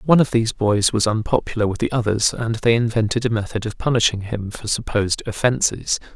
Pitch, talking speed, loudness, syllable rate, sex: 110 Hz, 195 wpm, -20 LUFS, 6.0 syllables/s, male